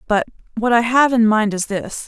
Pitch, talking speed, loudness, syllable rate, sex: 225 Hz, 230 wpm, -17 LUFS, 5.0 syllables/s, female